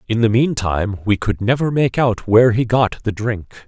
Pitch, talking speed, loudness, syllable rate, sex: 115 Hz, 210 wpm, -17 LUFS, 5.2 syllables/s, male